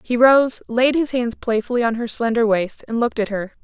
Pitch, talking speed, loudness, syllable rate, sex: 235 Hz, 230 wpm, -19 LUFS, 5.3 syllables/s, female